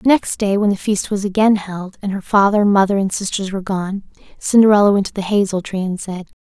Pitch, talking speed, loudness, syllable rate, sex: 200 Hz, 235 wpm, -17 LUFS, 5.7 syllables/s, female